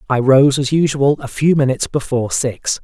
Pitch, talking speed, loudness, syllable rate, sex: 135 Hz, 190 wpm, -15 LUFS, 5.4 syllables/s, male